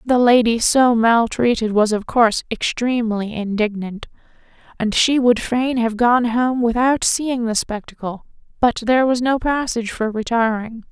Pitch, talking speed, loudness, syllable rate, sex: 235 Hz, 150 wpm, -18 LUFS, 4.6 syllables/s, female